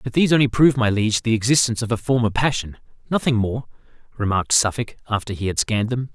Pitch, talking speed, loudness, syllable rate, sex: 115 Hz, 195 wpm, -20 LUFS, 7.0 syllables/s, male